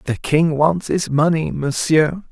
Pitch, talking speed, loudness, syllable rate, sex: 155 Hz, 155 wpm, -17 LUFS, 3.8 syllables/s, male